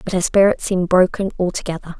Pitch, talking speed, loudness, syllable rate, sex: 185 Hz, 180 wpm, -17 LUFS, 6.6 syllables/s, female